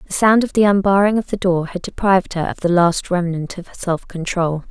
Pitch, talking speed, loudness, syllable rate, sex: 185 Hz, 230 wpm, -17 LUFS, 5.4 syllables/s, female